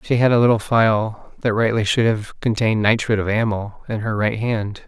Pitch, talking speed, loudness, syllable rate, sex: 110 Hz, 210 wpm, -19 LUFS, 5.2 syllables/s, male